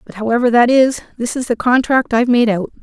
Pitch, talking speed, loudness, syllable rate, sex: 240 Hz, 235 wpm, -14 LUFS, 6.1 syllables/s, female